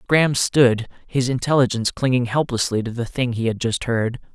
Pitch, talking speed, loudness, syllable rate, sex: 125 Hz, 180 wpm, -20 LUFS, 5.5 syllables/s, male